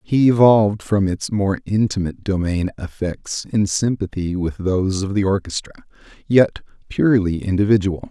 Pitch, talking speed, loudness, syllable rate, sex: 100 Hz, 135 wpm, -19 LUFS, 5.1 syllables/s, male